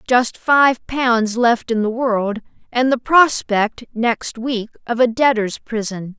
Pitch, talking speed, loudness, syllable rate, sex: 235 Hz, 145 wpm, -17 LUFS, 3.5 syllables/s, female